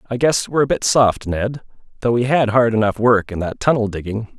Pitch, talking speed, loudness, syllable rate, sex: 115 Hz, 235 wpm, -18 LUFS, 5.4 syllables/s, male